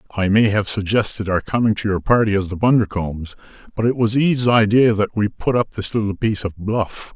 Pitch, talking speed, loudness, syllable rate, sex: 105 Hz, 220 wpm, -18 LUFS, 5.8 syllables/s, male